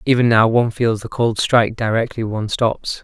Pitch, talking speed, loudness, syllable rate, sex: 115 Hz, 200 wpm, -17 LUFS, 5.5 syllables/s, male